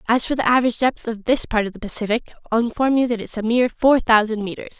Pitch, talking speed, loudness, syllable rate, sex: 230 Hz, 265 wpm, -20 LUFS, 6.9 syllables/s, female